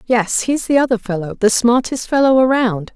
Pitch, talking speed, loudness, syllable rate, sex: 235 Hz, 165 wpm, -15 LUFS, 5.1 syllables/s, female